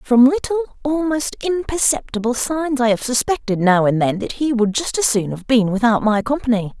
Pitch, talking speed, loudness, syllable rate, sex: 250 Hz, 195 wpm, -18 LUFS, 5.0 syllables/s, female